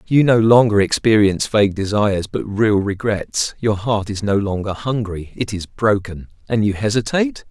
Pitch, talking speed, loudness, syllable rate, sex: 105 Hz, 170 wpm, -18 LUFS, 4.9 syllables/s, male